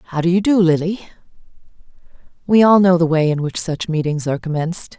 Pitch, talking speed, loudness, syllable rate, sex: 170 Hz, 195 wpm, -16 LUFS, 5.9 syllables/s, female